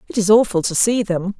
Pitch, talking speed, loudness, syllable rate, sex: 200 Hz, 260 wpm, -16 LUFS, 5.8 syllables/s, female